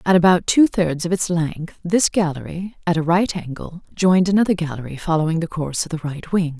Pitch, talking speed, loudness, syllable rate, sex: 170 Hz, 210 wpm, -19 LUFS, 5.6 syllables/s, female